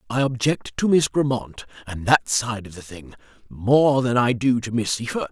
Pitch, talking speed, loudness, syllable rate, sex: 120 Hz, 205 wpm, -21 LUFS, 4.7 syllables/s, male